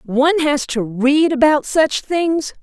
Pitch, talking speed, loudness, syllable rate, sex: 290 Hz, 160 wpm, -16 LUFS, 3.6 syllables/s, female